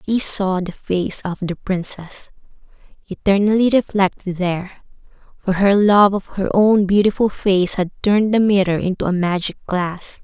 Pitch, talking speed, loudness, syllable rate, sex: 195 Hz, 145 wpm, -18 LUFS, 4.5 syllables/s, female